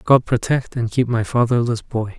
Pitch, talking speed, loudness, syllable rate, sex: 120 Hz, 190 wpm, -19 LUFS, 4.8 syllables/s, male